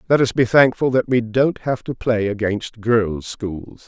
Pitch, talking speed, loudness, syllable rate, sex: 115 Hz, 200 wpm, -19 LUFS, 4.1 syllables/s, male